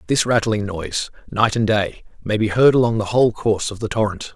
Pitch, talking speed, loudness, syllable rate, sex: 110 Hz, 220 wpm, -19 LUFS, 5.8 syllables/s, male